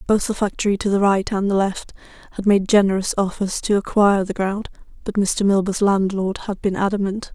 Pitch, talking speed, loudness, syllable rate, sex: 200 Hz, 195 wpm, -20 LUFS, 5.5 syllables/s, female